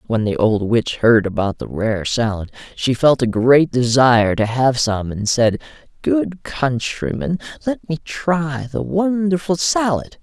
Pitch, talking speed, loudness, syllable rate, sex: 130 Hz, 160 wpm, -18 LUFS, 4.0 syllables/s, male